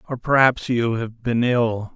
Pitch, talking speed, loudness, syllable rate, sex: 120 Hz, 185 wpm, -20 LUFS, 3.9 syllables/s, male